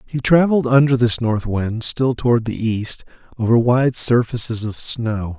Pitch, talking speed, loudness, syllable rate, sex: 120 Hz, 165 wpm, -17 LUFS, 4.5 syllables/s, male